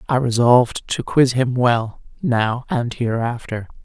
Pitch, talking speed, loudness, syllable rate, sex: 125 Hz, 140 wpm, -19 LUFS, 4.0 syllables/s, female